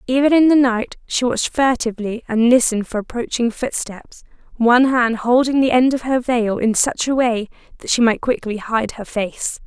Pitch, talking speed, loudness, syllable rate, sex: 240 Hz, 190 wpm, -17 LUFS, 5.1 syllables/s, female